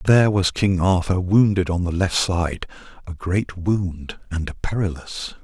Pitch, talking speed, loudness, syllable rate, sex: 90 Hz, 175 wpm, -21 LUFS, 4.4 syllables/s, male